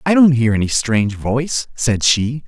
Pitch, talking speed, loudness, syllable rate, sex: 125 Hz, 195 wpm, -16 LUFS, 4.8 syllables/s, male